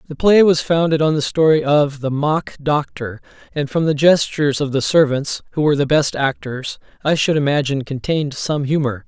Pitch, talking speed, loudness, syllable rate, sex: 145 Hz, 190 wpm, -17 LUFS, 5.3 syllables/s, male